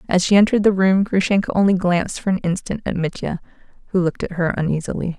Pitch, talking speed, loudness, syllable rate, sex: 185 Hz, 210 wpm, -19 LUFS, 6.9 syllables/s, female